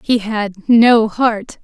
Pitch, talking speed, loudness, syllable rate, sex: 225 Hz, 145 wpm, -14 LUFS, 2.9 syllables/s, female